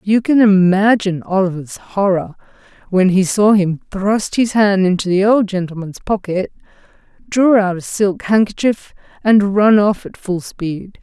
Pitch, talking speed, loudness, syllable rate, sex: 195 Hz, 150 wpm, -15 LUFS, 4.3 syllables/s, female